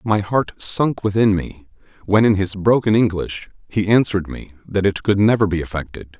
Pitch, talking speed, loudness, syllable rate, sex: 100 Hz, 185 wpm, -18 LUFS, 5.1 syllables/s, male